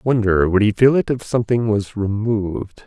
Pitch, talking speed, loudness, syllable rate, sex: 110 Hz, 190 wpm, -18 LUFS, 5.0 syllables/s, male